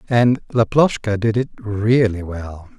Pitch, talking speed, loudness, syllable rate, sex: 110 Hz, 130 wpm, -18 LUFS, 3.8 syllables/s, male